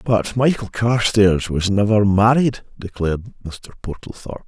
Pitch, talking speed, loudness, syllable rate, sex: 105 Hz, 105 wpm, -17 LUFS, 4.6 syllables/s, male